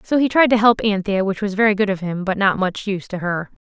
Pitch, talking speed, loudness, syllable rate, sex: 200 Hz, 290 wpm, -18 LUFS, 6.1 syllables/s, female